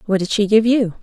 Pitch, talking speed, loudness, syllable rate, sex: 210 Hz, 295 wpm, -16 LUFS, 6.0 syllables/s, female